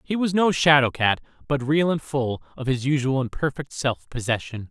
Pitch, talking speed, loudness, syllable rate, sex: 135 Hz, 205 wpm, -23 LUFS, 5.1 syllables/s, male